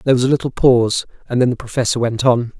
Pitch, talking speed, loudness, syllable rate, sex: 125 Hz, 255 wpm, -16 LUFS, 7.2 syllables/s, male